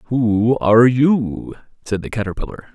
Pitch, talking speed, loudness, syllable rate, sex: 115 Hz, 130 wpm, -17 LUFS, 4.2 syllables/s, male